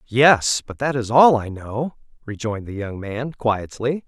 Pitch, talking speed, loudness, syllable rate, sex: 120 Hz, 175 wpm, -20 LUFS, 4.1 syllables/s, male